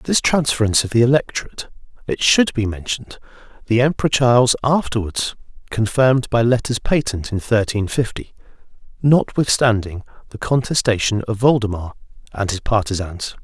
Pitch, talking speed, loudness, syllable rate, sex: 115 Hz, 125 wpm, -18 LUFS, 5.4 syllables/s, male